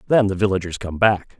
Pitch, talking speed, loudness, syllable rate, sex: 100 Hz, 215 wpm, -20 LUFS, 5.9 syllables/s, male